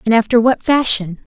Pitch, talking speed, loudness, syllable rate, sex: 225 Hz, 175 wpm, -14 LUFS, 5.5 syllables/s, female